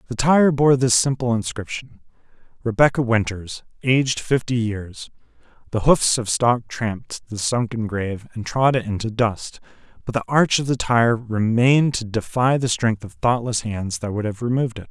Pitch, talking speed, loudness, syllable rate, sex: 115 Hz, 175 wpm, -20 LUFS, 4.8 syllables/s, male